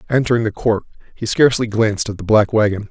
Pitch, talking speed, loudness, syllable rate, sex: 110 Hz, 205 wpm, -17 LUFS, 6.6 syllables/s, male